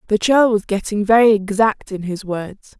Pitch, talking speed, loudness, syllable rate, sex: 210 Hz, 195 wpm, -17 LUFS, 4.6 syllables/s, female